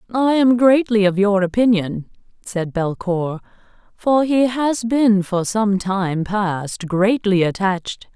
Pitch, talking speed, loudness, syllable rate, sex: 205 Hz, 135 wpm, -18 LUFS, 3.7 syllables/s, female